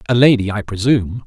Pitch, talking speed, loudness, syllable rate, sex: 110 Hz, 190 wpm, -16 LUFS, 6.4 syllables/s, male